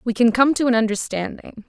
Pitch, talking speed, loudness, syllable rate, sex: 235 Hz, 215 wpm, -19 LUFS, 5.7 syllables/s, female